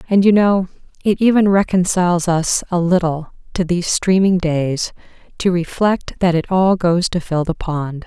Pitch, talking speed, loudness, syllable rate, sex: 180 Hz, 170 wpm, -16 LUFS, 4.6 syllables/s, female